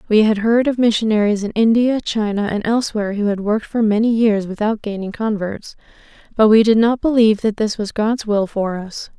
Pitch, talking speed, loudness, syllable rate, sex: 215 Hz, 200 wpm, -17 LUFS, 5.5 syllables/s, female